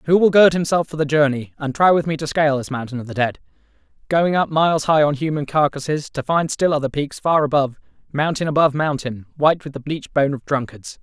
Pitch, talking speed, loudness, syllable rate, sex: 145 Hz, 225 wpm, -19 LUFS, 6.3 syllables/s, male